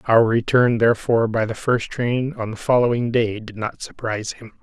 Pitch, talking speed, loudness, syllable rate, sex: 115 Hz, 195 wpm, -20 LUFS, 5.1 syllables/s, male